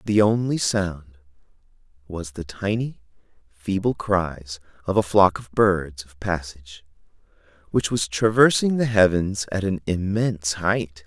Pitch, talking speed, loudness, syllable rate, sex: 95 Hz, 130 wpm, -22 LUFS, 4.1 syllables/s, male